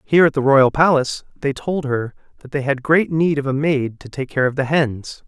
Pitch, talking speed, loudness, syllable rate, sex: 140 Hz, 250 wpm, -18 LUFS, 5.2 syllables/s, male